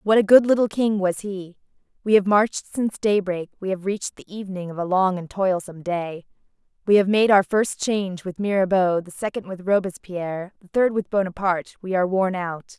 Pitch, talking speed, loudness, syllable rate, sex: 190 Hz, 200 wpm, -22 LUFS, 5.6 syllables/s, female